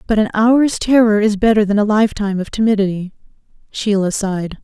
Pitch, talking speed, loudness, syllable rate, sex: 210 Hz, 170 wpm, -15 LUFS, 6.0 syllables/s, female